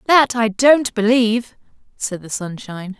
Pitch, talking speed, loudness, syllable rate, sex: 225 Hz, 140 wpm, -17 LUFS, 4.5 syllables/s, female